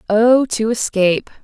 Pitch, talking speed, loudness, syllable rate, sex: 220 Hz, 125 wpm, -15 LUFS, 4.4 syllables/s, female